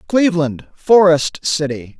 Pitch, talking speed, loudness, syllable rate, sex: 165 Hz, 90 wpm, -15 LUFS, 3.9 syllables/s, male